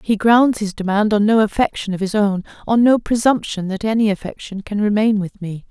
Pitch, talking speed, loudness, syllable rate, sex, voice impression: 210 Hz, 210 wpm, -17 LUFS, 5.4 syllables/s, female, very feminine, adult-like, slightly soft, fluent, slightly intellectual, elegant